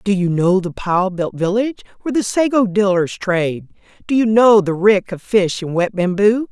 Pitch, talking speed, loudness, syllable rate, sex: 200 Hz, 205 wpm, -16 LUFS, 4.9 syllables/s, female